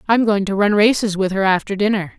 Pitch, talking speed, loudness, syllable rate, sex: 205 Hz, 250 wpm, -17 LUFS, 5.9 syllables/s, female